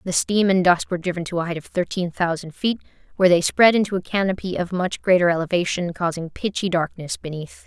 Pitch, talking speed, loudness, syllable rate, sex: 180 Hz, 210 wpm, -21 LUFS, 6.0 syllables/s, female